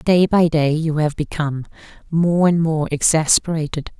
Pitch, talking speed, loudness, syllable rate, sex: 160 Hz, 150 wpm, -18 LUFS, 4.7 syllables/s, female